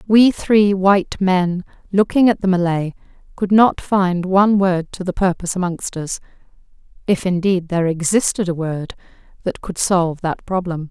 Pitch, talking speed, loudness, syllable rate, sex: 185 Hz, 155 wpm, -18 LUFS, 4.8 syllables/s, female